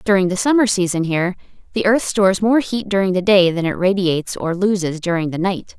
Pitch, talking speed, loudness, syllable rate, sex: 190 Hz, 220 wpm, -17 LUFS, 5.9 syllables/s, female